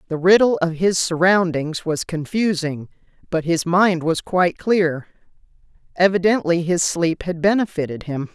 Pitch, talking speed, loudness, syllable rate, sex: 175 Hz, 130 wpm, -19 LUFS, 4.6 syllables/s, female